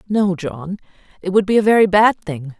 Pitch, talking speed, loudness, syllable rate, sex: 190 Hz, 210 wpm, -16 LUFS, 5.1 syllables/s, female